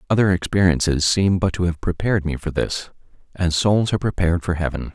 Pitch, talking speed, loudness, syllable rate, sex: 90 Hz, 195 wpm, -20 LUFS, 6.3 syllables/s, male